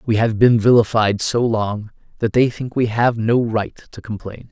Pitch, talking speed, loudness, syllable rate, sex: 115 Hz, 200 wpm, -17 LUFS, 4.5 syllables/s, male